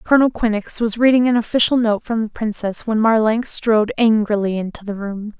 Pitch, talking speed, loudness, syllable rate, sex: 220 Hz, 190 wpm, -18 LUFS, 5.5 syllables/s, female